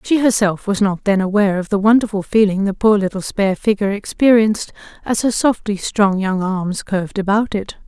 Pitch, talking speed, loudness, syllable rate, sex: 205 Hz, 190 wpm, -17 LUFS, 5.6 syllables/s, female